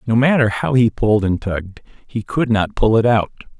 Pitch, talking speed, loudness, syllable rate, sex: 115 Hz, 215 wpm, -17 LUFS, 5.3 syllables/s, male